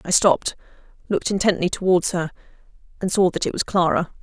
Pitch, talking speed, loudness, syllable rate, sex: 185 Hz, 140 wpm, -21 LUFS, 6.3 syllables/s, female